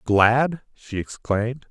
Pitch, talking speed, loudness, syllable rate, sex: 120 Hz, 105 wpm, -22 LUFS, 3.4 syllables/s, male